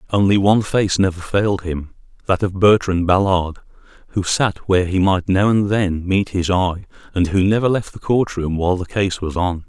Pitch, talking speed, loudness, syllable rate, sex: 95 Hz, 205 wpm, -18 LUFS, 5.1 syllables/s, male